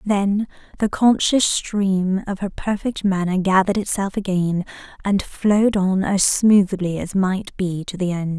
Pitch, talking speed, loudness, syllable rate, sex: 190 Hz, 155 wpm, -20 LUFS, 4.1 syllables/s, female